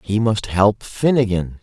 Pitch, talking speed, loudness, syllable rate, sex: 105 Hz, 150 wpm, -18 LUFS, 3.9 syllables/s, male